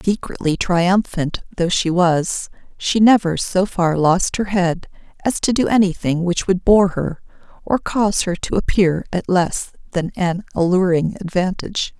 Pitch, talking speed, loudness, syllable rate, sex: 185 Hz, 155 wpm, -18 LUFS, 4.3 syllables/s, female